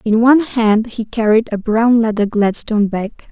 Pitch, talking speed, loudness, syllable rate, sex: 220 Hz, 180 wpm, -15 LUFS, 5.0 syllables/s, female